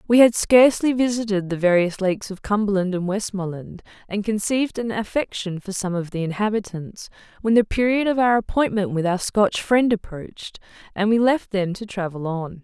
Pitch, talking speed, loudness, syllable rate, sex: 205 Hz, 180 wpm, -21 LUFS, 5.3 syllables/s, female